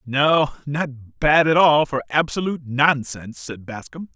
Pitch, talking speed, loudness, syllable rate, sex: 140 Hz, 130 wpm, -19 LUFS, 4.5 syllables/s, male